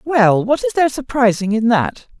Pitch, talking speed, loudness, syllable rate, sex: 240 Hz, 190 wpm, -16 LUFS, 5.0 syllables/s, female